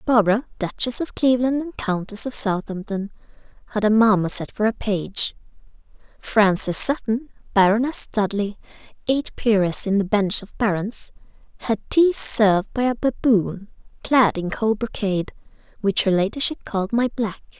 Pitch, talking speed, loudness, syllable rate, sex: 215 Hz, 140 wpm, -20 LUFS, 4.7 syllables/s, female